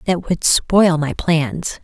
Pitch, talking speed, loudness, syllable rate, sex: 170 Hz, 165 wpm, -16 LUFS, 3.0 syllables/s, female